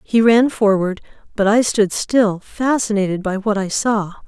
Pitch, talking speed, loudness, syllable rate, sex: 210 Hz, 170 wpm, -17 LUFS, 4.3 syllables/s, female